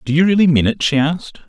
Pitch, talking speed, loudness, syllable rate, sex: 155 Hz, 285 wpm, -15 LUFS, 6.8 syllables/s, male